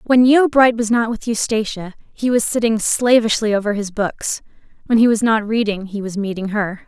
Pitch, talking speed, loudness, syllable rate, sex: 220 Hz, 190 wpm, -17 LUFS, 5.0 syllables/s, female